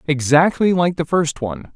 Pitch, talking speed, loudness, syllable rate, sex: 155 Hz, 170 wpm, -17 LUFS, 5.0 syllables/s, male